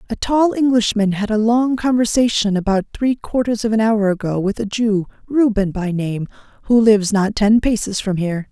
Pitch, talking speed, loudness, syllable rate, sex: 215 Hz, 190 wpm, -17 LUFS, 5.1 syllables/s, female